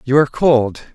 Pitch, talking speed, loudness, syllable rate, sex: 135 Hz, 190 wpm, -15 LUFS, 4.7 syllables/s, male